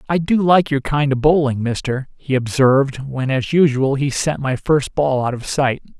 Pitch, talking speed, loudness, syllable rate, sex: 140 Hz, 210 wpm, -17 LUFS, 4.7 syllables/s, male